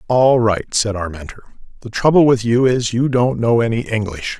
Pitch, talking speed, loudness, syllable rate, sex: 115 Hz, 205 wpm, -16 LUFS, 5.1 syllables/s, male